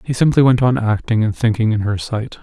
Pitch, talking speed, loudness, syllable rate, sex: 115 Hz, 250 wpm, -16 LUFS, 5.6 syllables/s, male